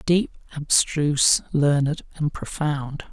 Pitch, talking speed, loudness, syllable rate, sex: 150 Hz, 95 wpm, -22 LUFS, 3.6 syllables/s, male